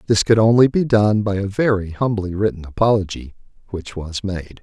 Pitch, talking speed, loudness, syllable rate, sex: 100 Hz, 180 wpm, -18 LUFS, 5.2 syllables/s, male